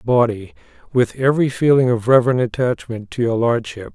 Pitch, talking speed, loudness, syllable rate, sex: 120 Hz, 150 wpm, -17 LUFS, 5.5 syllables/s, male